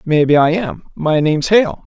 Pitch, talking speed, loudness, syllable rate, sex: 165 Hz, 155 wpm, -14 LUFS, 4.9 syllables/s, male